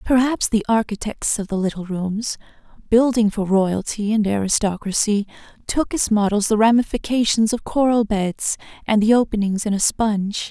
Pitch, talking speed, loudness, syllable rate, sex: 215 Hz, 150 wpm, -19 LUFS, 4.9 syllables/s, female